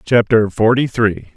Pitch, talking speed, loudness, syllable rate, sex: 110 Hz, 130 wpm, -15 LUFS, 4.3 syllables/s, male